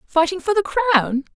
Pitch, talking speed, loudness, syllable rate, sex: 340 Hz, 175 wpm, -19 LUFS, 4.5 syllables/s, female